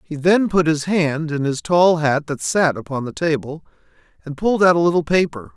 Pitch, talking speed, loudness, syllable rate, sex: 160 Hz, 215 wpm, -18 LUFS, 5.2 syllables/s, male